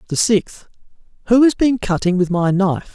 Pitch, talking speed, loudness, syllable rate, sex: 200 Hz, 185 wpm, -16 LUFS, 5.2 syllables/s, male